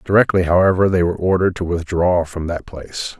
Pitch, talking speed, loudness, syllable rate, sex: 90 Hz, 190 wpm, -17 LUFS, 6.2 syllables/s, male